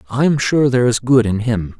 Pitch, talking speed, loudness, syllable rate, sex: 120 Hz, 265 wpm, -15 LUFS, 5.7 syllables/s, male